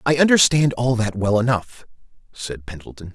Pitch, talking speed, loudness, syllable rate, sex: 120 Hz, 155 wpm, -18 LUFS, 5.0 syllables/s, male